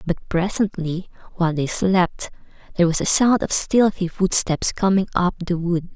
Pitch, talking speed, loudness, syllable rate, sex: 180 Hz, 160 wpm, -20 LUFS, 4.8 syllables/s, female